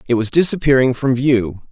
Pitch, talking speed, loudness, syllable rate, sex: 130 Hz, 175 wpm, -15 LUFS, 5.0 syllables/s, male